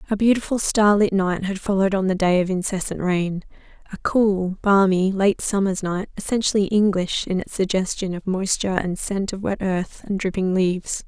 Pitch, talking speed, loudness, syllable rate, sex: 195 Hz, 180 wpm, -21 LUFS, 5.2 syllables/s, female